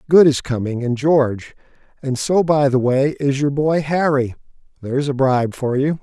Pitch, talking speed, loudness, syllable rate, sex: 140 Hz, 190 wpm, -18 LUFS, 4.1 syllables/s, male